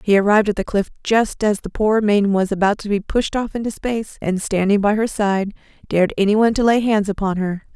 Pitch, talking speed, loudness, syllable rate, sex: 205 Hz, 230 wpm, -18 LUFS, 5.8 syllables/s, female